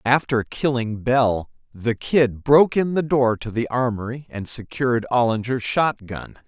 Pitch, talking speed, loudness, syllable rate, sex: 120 Hz, 160 wpm, -21 LUFS, 4.3 syllables/s, male